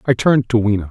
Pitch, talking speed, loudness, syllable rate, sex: 115 Hz, 265 wpm, -16 LUFS, 7.6 syllables/s, male